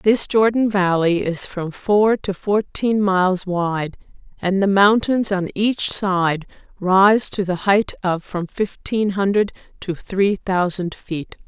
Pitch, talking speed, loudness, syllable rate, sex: 195 Hz, 145 wpm, -19 LUFS, 3.5 syllables/s, female